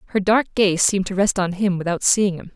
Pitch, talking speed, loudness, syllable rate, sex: 190 Hz, 260 wpm, -19 LUFS, 5.7 syllables/s, female